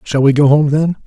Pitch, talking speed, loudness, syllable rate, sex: 145 Hz, 280 wpm, -12 LUFS, 5.6 syllables/s, male